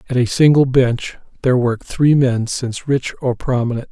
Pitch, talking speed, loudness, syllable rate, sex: 125 Hz, 185 wpm, -16 LUFS, 5.2 syllables/s, male